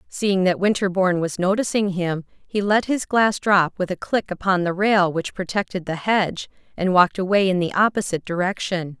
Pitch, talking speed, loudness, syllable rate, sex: 190 Hz, 185 wpm, -21 LUFS, 5.3 syllables/s, female